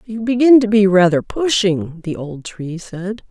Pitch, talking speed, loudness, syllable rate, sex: 195 Hz, 180 wpm, -15 LUFS, 4.2 syllables/s, female